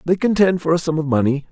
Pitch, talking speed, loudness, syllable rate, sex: 165 Hz, 280 wpm, -18 LUFS, 6.6 syllables/s, male